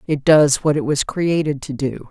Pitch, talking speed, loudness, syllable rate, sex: 145 Hz, 230 wpm, -17 LUFS, 4.6 syllables/s, female